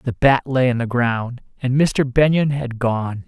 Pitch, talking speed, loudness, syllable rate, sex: 125 Hz, 200 wpm, -19 LUFS, 4.0 syllables/s, male